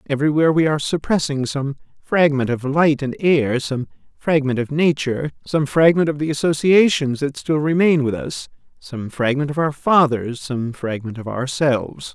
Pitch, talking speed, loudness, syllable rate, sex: 145 Hz, 165 wpm, -19 LUFS, 4.9 syllables/s, male